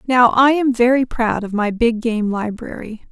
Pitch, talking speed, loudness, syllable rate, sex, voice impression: 235 Hz, 195 wpm, -17 LUFS, 4.5 syllables/s, female, very feminine, slightly young, slightly adult-like, very thin, tensed, slightly powerful, bright, very hard, very clear, fluent, slightly raspy, cute, slightly cool, intellectual, very refreshing, very sincere, slightly calm, friendly, reassuring, very unique, elegant, slightly wild, sweet, lively, slightly kind, strict, slightly intense, slightly sharp